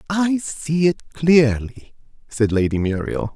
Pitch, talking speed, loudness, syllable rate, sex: 140 Hz, 125 wpm, -19 LUFS, 3.6 syllables/s, male